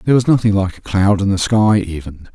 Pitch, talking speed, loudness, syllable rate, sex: 100 Hz, 255 wpm, -15 LUFS, 6.0 syllables/s, male